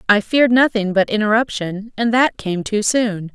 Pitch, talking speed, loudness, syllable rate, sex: 215 Hz, 180 wpm, -17 LUFS, 4.8 syllables/s, female